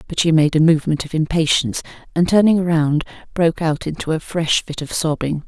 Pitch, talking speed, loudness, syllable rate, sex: 160 Hz, 195 wpm, -18 LUFS, 5.7 syllables/s, female